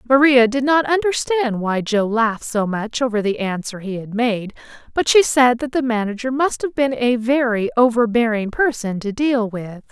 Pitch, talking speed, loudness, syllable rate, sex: 240 Hz, 190 wpm, -18 LUFS, 4.7 syllables/s, female